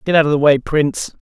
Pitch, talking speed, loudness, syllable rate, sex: 150 Hz, 290 wpm, -15 LUFS, 6.5 syllables/s, male